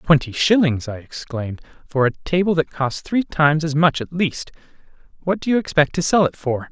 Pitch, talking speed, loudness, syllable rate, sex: 155 Hz, 195 wpm, -19 LUFS, 5.4 syllables/s, male